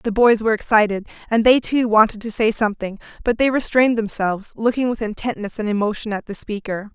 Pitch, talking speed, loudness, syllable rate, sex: 220 Hz, 200 wpm, -19 LUFS, 6.1 syllables/s, female